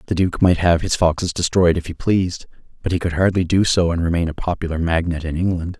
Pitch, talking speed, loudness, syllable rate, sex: 85 Hz, 240 wpm, -19 LUFS, 6.3 syllables/s, male